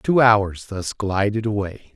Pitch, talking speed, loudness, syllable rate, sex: 105 Hz, 155 wpm, -21 LUFS, 3.7 syllables/s, male